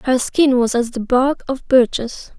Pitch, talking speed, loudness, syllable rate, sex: 250 Hz, 200 wpm, -17 LUFS, 4.2 syllables/s, female